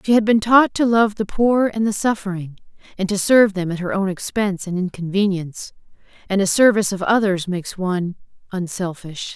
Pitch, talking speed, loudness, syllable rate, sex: 195 Hz, 185 wpm, -19 LUFS, 5.7 syllables/s, female